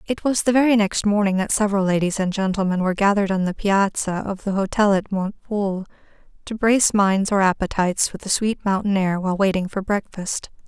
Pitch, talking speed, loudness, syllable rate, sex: 200 Hz, 195 wpm, -20 LUFS, 5.9 syllables/s, female